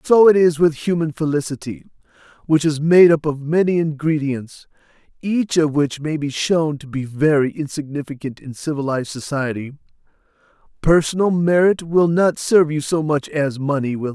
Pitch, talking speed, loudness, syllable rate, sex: 150 Hz, 155 wpm, -18 LUFS, 5.0 syllables/s, male